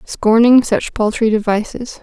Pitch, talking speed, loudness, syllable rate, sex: 225 Hz, 120 wpm, -14 LUFS, 4.2 syllables/s, female